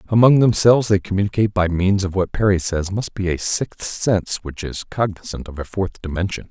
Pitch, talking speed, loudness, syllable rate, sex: 95 Hz, 205 wpm, -19 LUFS, 5.6 syllables/s, male